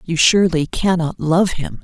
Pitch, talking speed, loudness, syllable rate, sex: 170 Hz, 165 wpm, -16 LUFS, 4.7 syllables/s, female